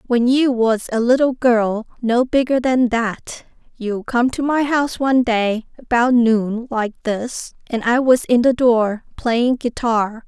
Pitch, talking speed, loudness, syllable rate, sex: 240 Hz, 170 wpm, -18 LUFS, 3.8 syllables/s, female